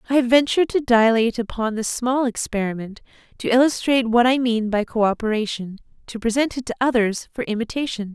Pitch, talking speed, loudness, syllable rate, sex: 235 Hz, 170 wpm, -20 LUFS, 6.0 syllables/s, female